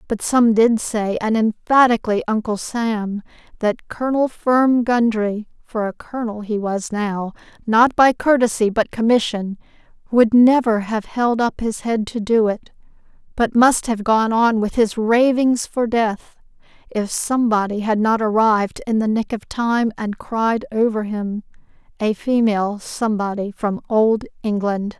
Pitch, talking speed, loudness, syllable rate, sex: 220 Hz, 145 wpm, -18 LUFS, 4.3 syllables/s, female